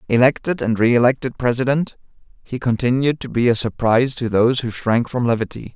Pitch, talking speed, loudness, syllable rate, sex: 120 Hz, 165 wpm, -18 LUFS, 5.9 syllables/s, male